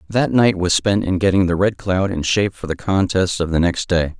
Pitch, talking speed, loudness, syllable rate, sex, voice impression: 95 Hz, 260 wpm, -18 LUFS, 5.2 syllables/s, male, very masculine, adult-like, slightly middle-aged, very thick, tensed, powerful, slightly dark, hard, clear, very fluent, very cool, very intellectual, slightly refreshing, very sincere, very calm, mature, friendly, reassuring, slightly unique, elegant, slightly wild, sweet, kind, slightly modest